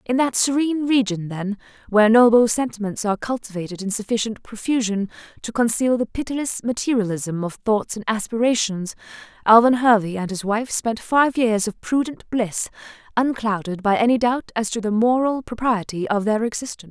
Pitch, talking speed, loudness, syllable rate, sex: 225 Hz, 160 wpm, -21 LUFS, 5.4 syllables/s, female